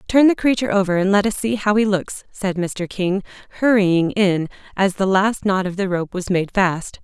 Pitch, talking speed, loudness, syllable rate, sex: 195 Hz, 220 wpm, -19 LUFS, 4.9 syllables/s, female